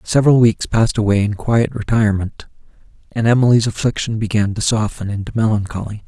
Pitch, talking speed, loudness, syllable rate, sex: 110 Hz, 150 wpm, -17 LUFS, 6.0 syllables/s, male